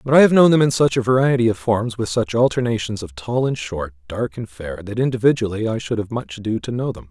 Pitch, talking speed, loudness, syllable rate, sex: 110 Hz, 260 wpm, -19 LUFS, 6.0 syllables/s, male